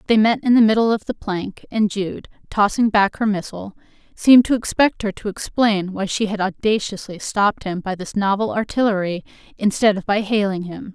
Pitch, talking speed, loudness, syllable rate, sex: 205 Hz, 190 wpm, -19 LUFS, 5.3 syllables/s, female